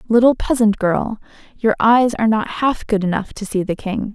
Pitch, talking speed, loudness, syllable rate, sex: 215 Hz, 200 wpm, -18 LUFS, 5.1 syllables/s, female